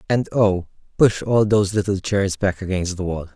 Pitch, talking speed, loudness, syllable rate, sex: 100 Hz, 195 wpm, -20 LUFS, 5.0 syllables/s, male